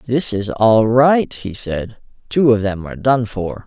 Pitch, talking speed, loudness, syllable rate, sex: 115 Hz, 195 wpm, -16 LUFS, 4.0 syllables/s, male